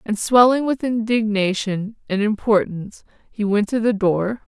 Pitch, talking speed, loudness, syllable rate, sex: 215 Hz, 145 wpm, -19 LUFS, 4.5 syllables/s, female